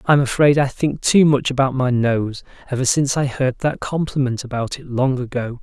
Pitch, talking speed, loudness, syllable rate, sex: 130 Hz, 205 wpm, -19 LUFS, 5.1 syllables/s, male